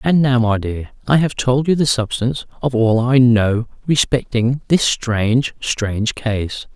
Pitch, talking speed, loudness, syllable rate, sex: 120 Hz, 170 wpm, -17 LUFS, 4.2 syllables/s, male